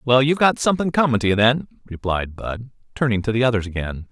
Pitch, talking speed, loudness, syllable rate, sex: 120 Hz, 220 wpm, -20 LUFS, 6.4 syllables/s, male